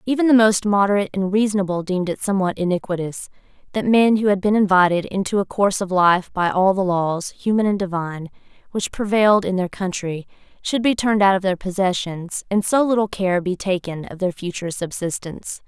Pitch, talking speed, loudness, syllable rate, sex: 190 Hz, 190 wpm, -20 LUFS, 5.8 syllables/s, female